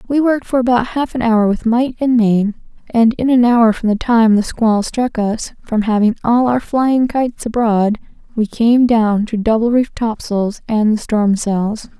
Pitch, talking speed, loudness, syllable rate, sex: 230 Hz, 205 wpm, -15 LUFS, 4.5 syllables/s, female